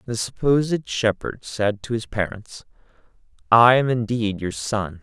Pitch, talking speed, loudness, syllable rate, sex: 115 Hz, 145 wpm, -21 LUFS, 4.2 syllables/s, male